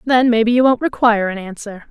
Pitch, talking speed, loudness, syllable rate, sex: 225 Hz, 220 wpm, -15 LUFS, 6.1 syllables/s, female